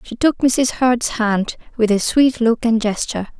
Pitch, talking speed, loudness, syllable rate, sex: 230 Hz, 195 wpm, -17 LUFS, 4.3 syllables/s, female